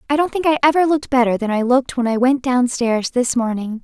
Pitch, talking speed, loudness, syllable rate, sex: 255 Hz, 250 wpm, -17 LUFS, 6.2 syllables/s, female